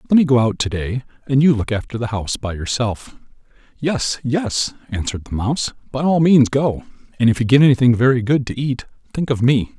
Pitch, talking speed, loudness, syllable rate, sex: 125 Hz, 210 wpm, -18 LUFS, 5.7 syllables/s, male